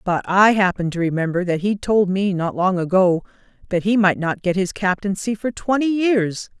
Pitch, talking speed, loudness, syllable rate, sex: 195 Hz, 200 wpm, -19 LUFS, 4.9 syllables/s, female